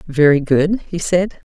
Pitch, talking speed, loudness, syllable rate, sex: 165 Hz, 160 wpm, -16 LUFS, 3.9 syllables/s, female